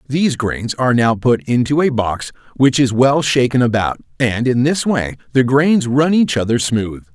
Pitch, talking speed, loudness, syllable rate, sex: 125 Hz, 195 wpm, -15 LUFS, 4.6 syllables/s, male